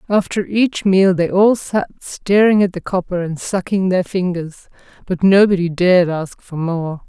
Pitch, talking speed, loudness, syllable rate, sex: 185 Hz, 170 wpm, -16 LUFS, 4.4 syllables/s, female